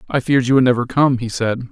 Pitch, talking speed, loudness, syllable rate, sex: 125 Hz, 280 wpm, -16 LUFS, 6.6 syllables/s, male